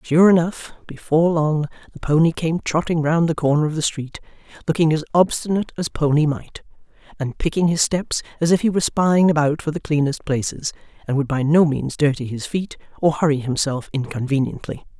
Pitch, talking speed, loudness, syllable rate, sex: 155 Hz, 185 wpm, -20 LUFS, 5.5 syllables/s, female